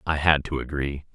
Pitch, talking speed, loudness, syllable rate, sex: 75 Hz, 210 wpm, -24 LUFS, 5.2 syllables/s, male